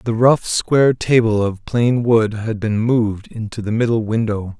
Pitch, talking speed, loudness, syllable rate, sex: 110 Hz, 185 wpm, -17 LUFS, 4.4 syllables/s, male